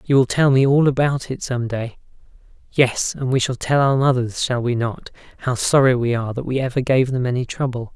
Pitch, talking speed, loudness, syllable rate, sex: 130 Hz, 210 wpm, -19 LUFS, 5.5 syllables/s, male